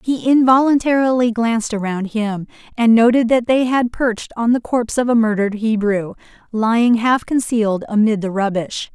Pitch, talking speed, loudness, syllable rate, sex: 230 Hz, 160 wpm, -16 LUFS, 5.2 syllables/s, female